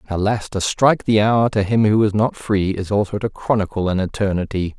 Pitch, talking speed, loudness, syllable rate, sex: 100 Hz, 215 wpm, -18 LUFS, 5.5 syllables/s, male